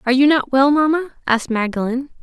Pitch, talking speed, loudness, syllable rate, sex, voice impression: 265 Hz, 190 wpm, -17 LUFS, 6.6 syllables/s, female, feminine, slightly adult-like, slightly tensed, slightly soft, slightly cute, slightly refreshing, friendly, kind